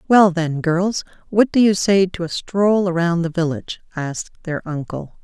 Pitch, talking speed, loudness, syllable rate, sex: 180 Hz, 185 wpm, -19 LUFS, 4.7 syllables/s, female